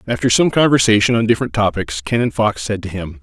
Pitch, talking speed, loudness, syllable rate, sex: 105 Hz, 205 wpm, -16 LUFS, 6.5 syllables/s, male